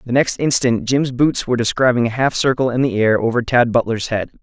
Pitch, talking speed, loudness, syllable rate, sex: 120 Hz, 230 wpm, -17 LUFS, 5.7 syllables/s, male